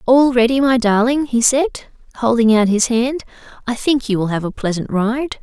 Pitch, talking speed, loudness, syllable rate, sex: 240 Hz, 200 wpm, -16 LUFS, 4.9 syllables/s, female